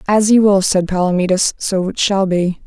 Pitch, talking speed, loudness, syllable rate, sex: 190 Hz, 200 wpm, -15 LUFS, 4.9 syllables/s, female